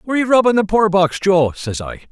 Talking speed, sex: 225 wpm, male